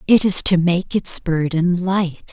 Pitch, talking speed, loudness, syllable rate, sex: 175 Hz, 180 wpm, -17 LUFS, 3.7 syllables/s, female